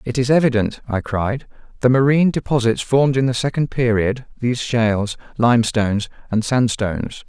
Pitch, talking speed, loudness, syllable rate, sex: 120 Hz, 150 wpm, -18 LUFS, 5.5 syllables/s, male